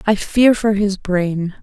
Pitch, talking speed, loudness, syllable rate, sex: 200 Hz, 185 wpm, -16 LUFS, 3.5 syllables/s, female